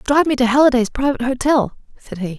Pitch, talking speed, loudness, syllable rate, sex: 250 Hz, 200 wpm, -17 LUFS, 6.7 syllables/s, female